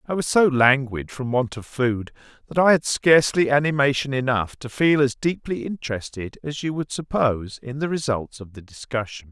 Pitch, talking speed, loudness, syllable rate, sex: 135 Hz, 185 wpm, -22 LUFS, 5.1 syllables/s, male